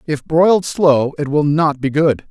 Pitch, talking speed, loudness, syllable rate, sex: 150 Hz, 210 wpm, -15 LUFS, 4.2 syllables/s, male